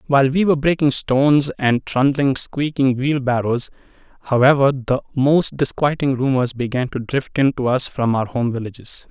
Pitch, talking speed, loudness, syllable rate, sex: 135 Hz, 160 wpm, -18 LUFS, 4.9 syllables/s, male